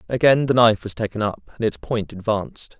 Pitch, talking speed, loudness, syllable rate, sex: 115 Hz, 215 wpm, -20 LUFS, 5.8 syllables/s, male